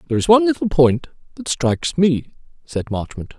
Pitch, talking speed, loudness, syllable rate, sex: 155 Hz, 175 wpm, -18 LUFS, 5.7 syllables/s, male